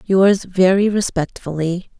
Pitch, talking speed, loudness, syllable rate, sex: 185 Hz, 90 wpm, -17 LUFS, 3.8 syllables/s, female